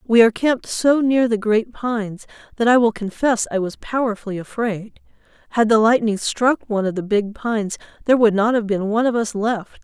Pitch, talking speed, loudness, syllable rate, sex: 225 Hz, 205 wpm, -19 LUFS, 5.5 syllables/s, female